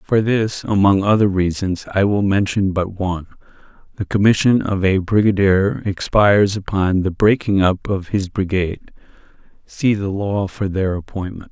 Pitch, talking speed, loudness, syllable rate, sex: 100 Hz, 150 wpm, -18 LUFS, 4.2 syllables/s, male